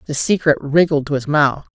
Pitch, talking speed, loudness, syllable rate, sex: 150 Hz, 205 wpm, -16 LUFS, 5.2 syllables/s, female